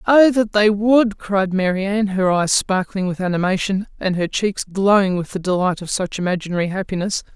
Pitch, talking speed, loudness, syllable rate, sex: 195 Hz, 180 wpm, -18 LUFS, 5.2 syllables/s, female